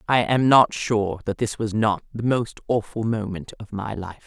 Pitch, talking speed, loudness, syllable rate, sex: 110 Hz, 210 wpm, -22 LUFS, 4.5 syllables/s, female